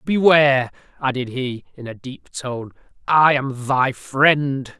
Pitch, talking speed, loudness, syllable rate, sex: 135 Hz, 125 wpm, -18 LUFS, 3.9 syllables/s, male